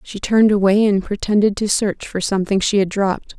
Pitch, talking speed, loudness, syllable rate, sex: 200 Hz, 215 wpm, -17 LUFS, 5.8 syllables/s, female